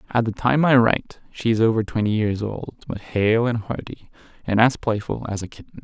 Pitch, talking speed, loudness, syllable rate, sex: 110 Hz, 215 wpm, -21 LUFS, 5.2 syllables/s, male